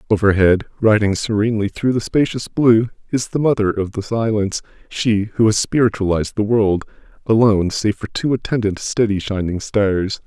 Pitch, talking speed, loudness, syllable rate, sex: 110 Hz, 160 wpm, -18 LUFS, 5.2 syllables/s, male